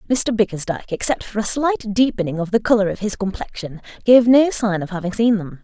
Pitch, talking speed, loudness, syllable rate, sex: 210 Hz, 215 wpm, -19 LUFS, 5.8 syllables/s, female